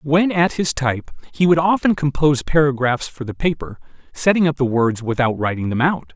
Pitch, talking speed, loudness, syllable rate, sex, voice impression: 145 Hz, 195 wpm, -18 LUFS, 5.4 syllables/s, male, masculine, adult-like, thick, tensed, powerful, clear, fluent, intellectual, slightly friendly, wild, lively, slightly kind